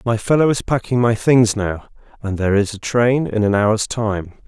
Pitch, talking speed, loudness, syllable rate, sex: 110 Hz, 215 wpm, -17 LUFS, 4.9 syllables/s, male